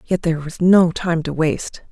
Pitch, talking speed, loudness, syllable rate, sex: 170 Hz, 220 wpm, -18 LUFS, 5.1 syllables/s, female